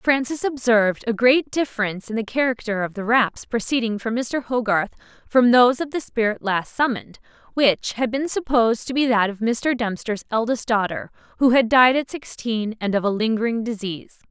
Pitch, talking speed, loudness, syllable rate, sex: 235 Hz, 185 wpm, -21 LUFS, 5.3 syllables/s, female